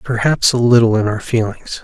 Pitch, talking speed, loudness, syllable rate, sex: 115 Hz, 195 wpm, -15 LUFS, 5.2 syllables/s, male